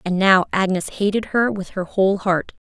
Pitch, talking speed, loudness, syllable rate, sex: 195 Hz, 200 wpm, -19 LUFS, 5.1 syllables/s, female